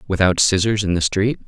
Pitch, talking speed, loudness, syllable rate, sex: 100 Hz, 205 wpm, -18 LUFS, 5.6 syllables/s, male